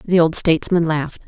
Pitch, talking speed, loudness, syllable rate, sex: 165 Hz, 190 wpm, -17 LUFS, 6.1 syllables/s, female